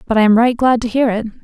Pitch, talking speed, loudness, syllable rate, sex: 230 Hz, 335 wpm, -14 LUFS, 7.0 syllables/s, female